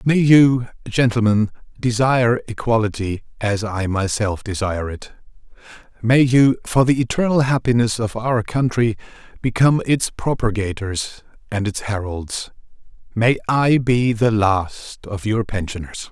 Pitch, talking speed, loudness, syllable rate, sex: 115 Hz, 125 wpm, -19 LUFS, 4.4 syllables/s, male